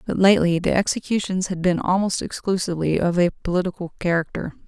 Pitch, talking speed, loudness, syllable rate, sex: 180 Hz, 155 wpm, -21 LUFS, 6.2 syllables/s, female